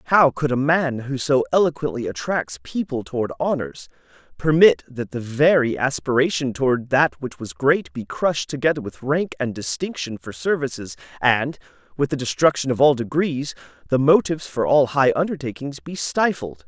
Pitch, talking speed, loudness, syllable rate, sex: 135 Hz, 160 wpm, -21 LUFS, 5.0 syllables/s, male